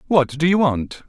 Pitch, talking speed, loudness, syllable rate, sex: 150 Hz, 220 wpm, -19 LUFS, 4.6 syllables/s, male